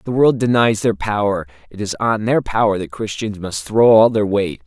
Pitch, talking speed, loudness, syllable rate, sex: 105 Hz, 220 wpm, -17 LUFS, 4.8 syllables/s, male